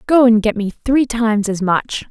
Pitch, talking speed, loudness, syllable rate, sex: 225 Hz, 230 wpm, -16 LUFS, 4.9 syllables/s, female